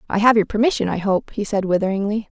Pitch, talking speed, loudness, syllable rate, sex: 205 Hz, 225 wpm, -19 LUFS, 6.6 syllables/s, female